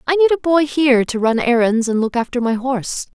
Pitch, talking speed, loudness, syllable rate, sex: 260 Hz, 245 wpm, -17 LUFS, 5.7 syllables/s, female